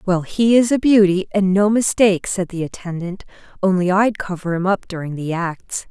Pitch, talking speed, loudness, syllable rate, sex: 190 Hz, 195 wpm, -18 LUFS, 5.0 syllables/s, female